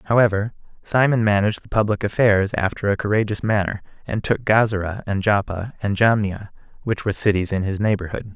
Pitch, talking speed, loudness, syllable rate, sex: 105 Hz, 165 wpm, -20 LUFS, 5.7 syllables/s, male